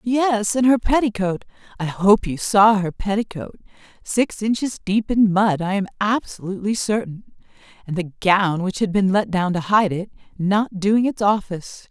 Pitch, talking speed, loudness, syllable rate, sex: 200 Hz, 170 wpm, -20 LUFS, 4.6 syllables/s, female